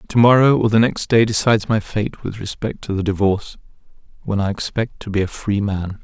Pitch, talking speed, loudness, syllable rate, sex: 105 Hz, 220 wpm, -18 LUFS, 5.6 syllables/s, male